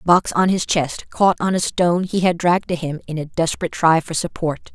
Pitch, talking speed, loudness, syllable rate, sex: 170 Hz, 255 wpm, -19 LUFS, 5.9 syllables/s, female